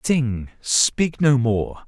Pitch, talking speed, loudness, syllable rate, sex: 125 Hz, 130 wpm, -20 LUFS, 2.5 syllables/s, male